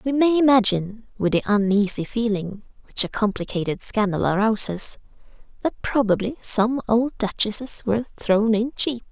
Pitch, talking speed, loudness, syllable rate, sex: 220 Hz, 140 wpm, -21 LUFS, 4.9 syllables/s, female